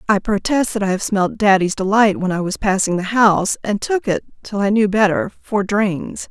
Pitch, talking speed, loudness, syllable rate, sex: 205 Hz, 200 wpm, -17 LUFS, 5.0 syllables/s, female